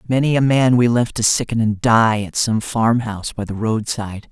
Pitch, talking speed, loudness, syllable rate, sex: 115 Hz, 210 wpm, -17 LUFS, 5.1 syllables/s, male